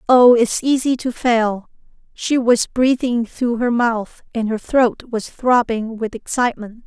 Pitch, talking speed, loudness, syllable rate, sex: 235 Hz, 155 wpm, -18 LUFS, 3.9 syllables/s, female